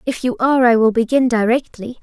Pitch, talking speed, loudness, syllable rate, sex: 245 Hz, 205 wpm, -15 LUFS, 6.0 syllables/s, female